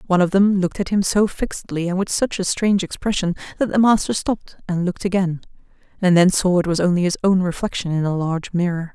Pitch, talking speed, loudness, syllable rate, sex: 185 Hz, 230 wpm, -19 LUFS, 6.4 syllables/s, female